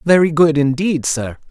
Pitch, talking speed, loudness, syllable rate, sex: 155 Hz, 160 wpm, -15 LUFS, 4.6 syllables/s, male